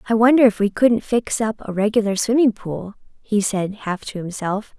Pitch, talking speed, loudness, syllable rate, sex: 210 Hz, 200 wpm, -19 LUFS, 4.9 syllables/s, female